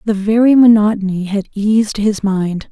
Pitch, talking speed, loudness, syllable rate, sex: 210 Hz, 155 wpm, -13 LUFS, 4.9 syllables/s, female